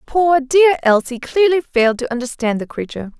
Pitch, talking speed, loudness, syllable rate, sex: 275 Hz, 170 wpm, -16 LUFS, 5.4 syllables/s, female